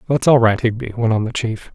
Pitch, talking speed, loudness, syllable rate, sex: 115 Hz, 275 wpm, -17 LUFS, 6.0 syllables/s, male